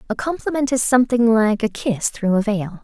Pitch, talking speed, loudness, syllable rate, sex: 225 Hz, 210 wpm, -19 LUFS, 5.3 syllables/s, female